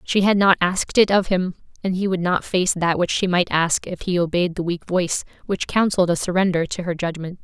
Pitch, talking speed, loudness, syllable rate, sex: 180 Hz, 240 wpm, -20 LUFS, 5.6 syllables/s, female